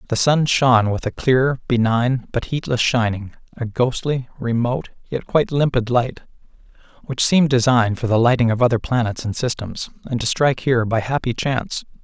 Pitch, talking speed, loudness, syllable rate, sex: 125 Hz, 175 wpm, -19 LUFS, 5.4 syllables/s, male